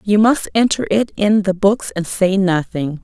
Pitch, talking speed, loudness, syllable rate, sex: 200 Hz, 200 wpm, -16 LUFS, 4.3 syllables/s, female